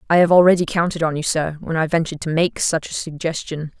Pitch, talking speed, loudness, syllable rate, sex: 160 Hz, 235 wpm, -19 LUFS, 6.2 syllables/s, female